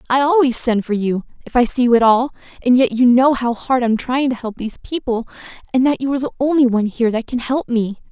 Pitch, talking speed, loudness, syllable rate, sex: 250 Hz, 250 wpm, -17 LUFS, 6.3 syllables/s, female